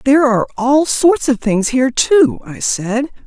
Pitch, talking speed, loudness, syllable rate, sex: 255 Hz, 185 wpm, -14 LUFS, 4.6 syllables/s, female